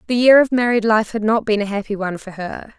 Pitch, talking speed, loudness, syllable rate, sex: 220 Hz, 280 wpm, -17 LUFS, 6.2 syllables/s, female